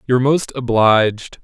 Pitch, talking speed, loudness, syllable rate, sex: 120 Hz, 125 wpm, -15 LUFS, 4.0 syllables/s, male